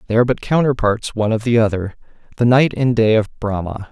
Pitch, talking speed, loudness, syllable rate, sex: 115 Hz, 200 wpm, -17 LUFS, 6.0 syllables/s, male